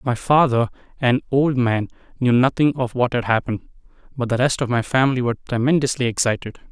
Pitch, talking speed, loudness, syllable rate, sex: 125 Hz, 180 wpm, -20 LUFS, 6.0 syllables/s, male